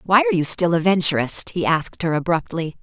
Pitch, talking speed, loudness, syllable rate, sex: 180 Hz, 215 wpm, -19 LUFS, 6.2 syllables/s, female